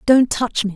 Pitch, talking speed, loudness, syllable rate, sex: 230 Hz, 240 wpm, -17 LUFS, 4.8 syllables/s, female